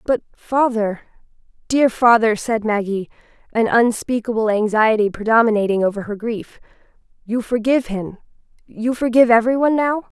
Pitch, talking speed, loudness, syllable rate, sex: 230 Hz, 120 wpm, -18 LUFS, 5.4 syllables/s, female